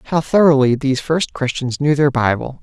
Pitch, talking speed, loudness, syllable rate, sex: 140 Hz, 185 wpm, -16 LUFS, 5.4 syllables/s, male